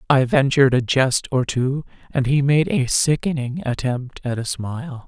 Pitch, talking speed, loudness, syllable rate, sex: 135 Hz, 175 wpm, -20 LUFS, 4.6 syllables/s, female